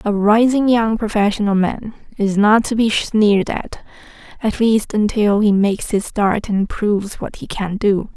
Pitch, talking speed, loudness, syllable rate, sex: 210 Hz, 175 wpm, -17 LUFS, 4.4 syllables/s, female